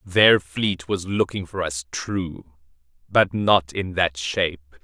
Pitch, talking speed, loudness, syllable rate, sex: 90 Hz, 150 wpm, -22 LUFS, 3.5 syllables/s, male